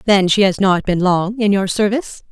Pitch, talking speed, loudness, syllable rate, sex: 200 Hz, 235 wpm, -15 LUFS, 5.2 syllables/s, female